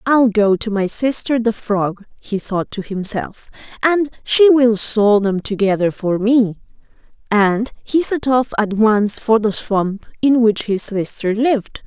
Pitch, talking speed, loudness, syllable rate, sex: 220 Hz, 165 wpm, -17 LUFS, 3.8 syllables/s, female